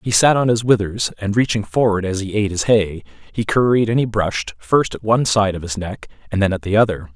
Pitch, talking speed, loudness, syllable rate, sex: 105 Hz, 250 wpm, -18 LUFS, 5.9 syllables/s, male